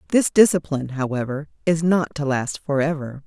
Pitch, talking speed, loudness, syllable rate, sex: 150 Hz, 145 wpm, -21 LUFS, 5.5 syllables/s, female